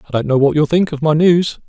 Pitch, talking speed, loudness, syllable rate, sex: 155 Hz, 320 wpm, -14 LUFS, 6.2 syllables/s, male